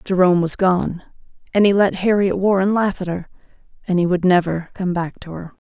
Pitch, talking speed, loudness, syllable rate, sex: 185 Hz, 190 wpm, -18 LUFS, 5.4 syllables/s, female